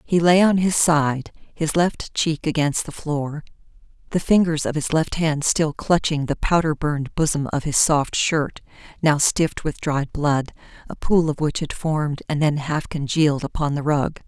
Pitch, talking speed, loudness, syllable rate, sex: 155 Hz, 190 wpm, -21 LUFS, 4.5 syllables/s, female